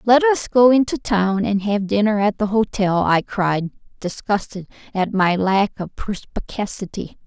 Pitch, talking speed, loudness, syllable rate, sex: 205 Hz, 155 wpm, -19 LUFS, 4.3 syllables/s, female